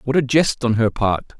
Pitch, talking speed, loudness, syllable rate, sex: 125 Hz, 260 wpm, -18 LUFS, 5.1 syllables/s, male